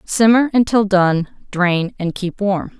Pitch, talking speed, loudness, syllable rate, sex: 195 Hz, 150 wpm, -16 LUFS, 3.5 syllables/s, female